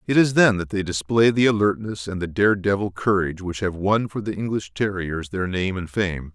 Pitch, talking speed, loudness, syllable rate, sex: 100 Hz, 225 wpm, -22 LUFS, 5.1 syllables/s, male